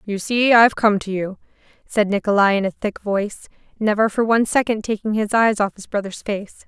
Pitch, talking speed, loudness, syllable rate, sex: 210 Hz, 205 wpm, -19 LUFS, 5.6 syllables/s, female